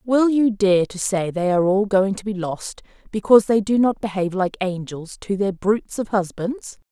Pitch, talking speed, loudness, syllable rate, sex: 200 Hz, 210 wpm, -20 LUFS, 5.0 syllables/s, female